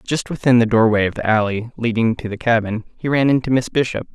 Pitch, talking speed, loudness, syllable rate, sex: 115 Hz, 230 wpm, -18 LUFS, 6.0 syllables/s, male